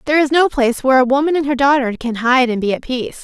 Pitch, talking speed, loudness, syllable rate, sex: 265 Hz, 295 wpm, -15 LUFS, 7.2 syllables/s, female